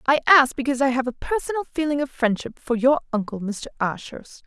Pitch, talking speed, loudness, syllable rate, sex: 260 Hz, 200 wpm, -22 LUFS, 6.1 syllables/s, female